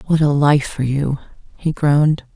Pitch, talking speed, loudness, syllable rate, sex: 145 Hz, 180 wpm, -17 LUFS, 4.6 syllables/s, female